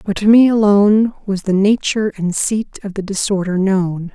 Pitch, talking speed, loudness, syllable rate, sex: 200 Hz, 190 wpm, -15 LUFS, 5.1 syllables/s, female